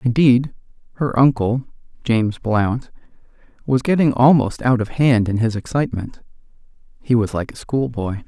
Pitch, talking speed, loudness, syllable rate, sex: 120 Hz, 140 wpm, -18 LUFS, 4.8 syllables/s, male